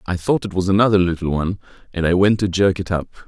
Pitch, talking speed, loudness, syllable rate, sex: 95 Hz, 255 wpm, -18 LUFS, 6.8 syllables/s, male